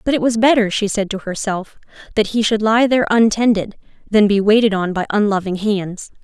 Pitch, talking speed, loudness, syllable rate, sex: 210 Hz, 200 wpm, -16 LUFS, 5.4 syllables/s, female